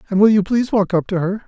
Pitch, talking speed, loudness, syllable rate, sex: 200 Hz, 325 wpm, -17 LUFS, 7.3 syllables/s, male